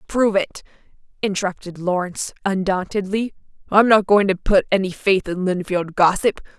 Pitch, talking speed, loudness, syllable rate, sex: 190 Hz, 135 wpm, -19 LUFS, 5.2 syllables/s, female